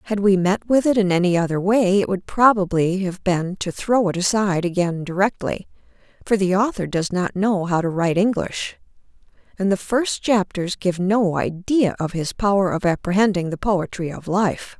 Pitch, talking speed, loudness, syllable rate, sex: 190 Hz, 185 wpm, -20 LUFS, 5.0 syllables/s, female